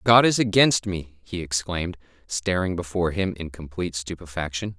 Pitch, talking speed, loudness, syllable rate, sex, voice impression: 90 Hz, 150 wpm, -24 LUFS, 5.3 syllables/s, male, masculine, middle-aged, tensed, powerful, hard, clear, fluent, cool, intellectual, reassuring, wild, lively, slightly strict